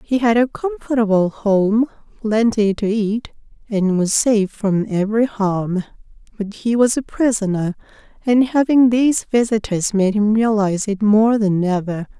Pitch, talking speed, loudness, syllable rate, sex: 215 Hz, 150 wpm, -17 LUFS, 4.5 syllables/s, female